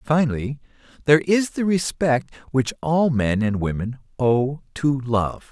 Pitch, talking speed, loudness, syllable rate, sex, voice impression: 135 Hz, 150 wpm, -22 LUFS, 4.4 syllables/s, male, masculine, middle-aged, thick, tensed, powerful, slightly raspy, intellectual, mature, friendly, reassuring, wild, lively, kind